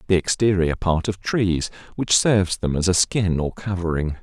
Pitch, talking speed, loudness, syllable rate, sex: 90 Hz, 185 wpm, -21 LUFS, 4.8 syllables/s, male